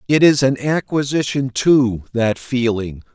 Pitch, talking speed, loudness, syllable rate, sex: 130 Hz, 135 wpm, -17 LUFS, 3.9 syllables/s, male